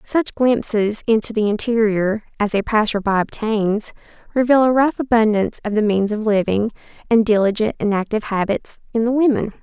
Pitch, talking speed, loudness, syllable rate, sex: 220 Hz, 170 wpm, -18 LUFS, 5.3 syllables/s, female